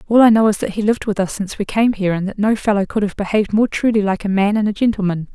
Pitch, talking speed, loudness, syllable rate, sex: 205 Hz, 315 wpm, -17 LUFS, 7.2 syllables/s, female